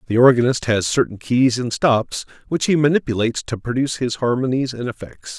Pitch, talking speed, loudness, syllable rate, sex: 125 Hz, 180 wpm, -19 LUFS, 5.6 syllables/s, male